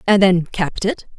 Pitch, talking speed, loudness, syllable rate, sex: 185 Hz, 200 wpm, -18 LUFS, 4.1 syllables/s, female